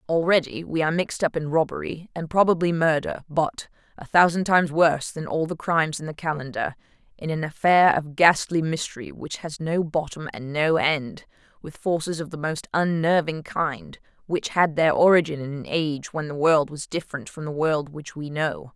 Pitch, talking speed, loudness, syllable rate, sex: 160 Hz, 180 wpm, -23 LUFS, 5.2 syllables/s, female